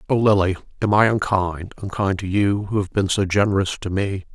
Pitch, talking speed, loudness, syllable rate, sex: 100 Hz, 195 wpm, -20 LUFS, 5.1 syllables/s, male